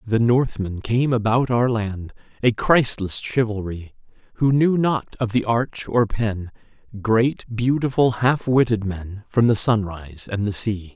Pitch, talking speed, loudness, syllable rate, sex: 115 Hz, 155 wpm, -21 LUFS, 4.0 syllables/s, male